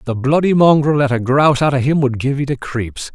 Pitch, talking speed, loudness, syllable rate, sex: 140 Hz, 265 wpm, -15 LUFS, 5.7 syllables/s, male